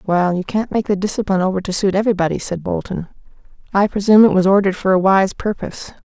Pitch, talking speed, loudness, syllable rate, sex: 195 Hz, 205 wpm, -17 LUFS, 6.9 syllables/s, female